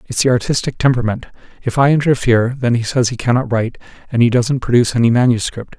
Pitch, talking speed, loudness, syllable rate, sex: 125 Hz, 195 wpm, -15 LUFS, 7.0 syllables/s, male